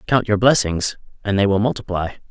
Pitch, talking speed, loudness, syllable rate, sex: 105 Hz, 180 wpm, -19 LUFS, 5.5 syllables/s, male